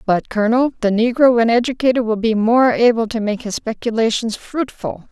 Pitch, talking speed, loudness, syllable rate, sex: 230 Hz, 175 wpm, -17 LUFS, 5.3 syllables/s, female